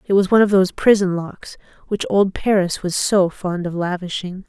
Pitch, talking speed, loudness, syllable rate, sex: 190 Hz, 200 wpm, -18 LUFS, 5.2 syllables/s, female